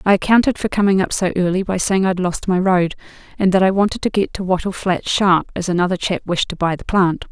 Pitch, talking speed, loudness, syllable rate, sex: 185 Hz, 255 wpm, -17 LUFS, 5.9 syllables/s, female